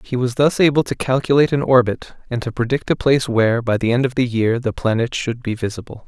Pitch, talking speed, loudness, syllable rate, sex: 125 Hz, 245 wpm, -18 LUFS, 6.2 syllables/s, male